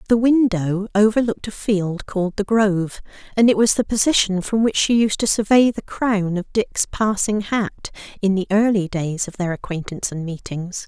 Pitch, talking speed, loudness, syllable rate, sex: 205 Hz, 190 wpm, -19 LUFS, 4.9 syllables/s, female